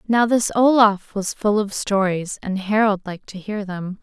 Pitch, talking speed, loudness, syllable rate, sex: 205 Hz, 195 wpm, -20 LUFS, 4.5 syllables/s, female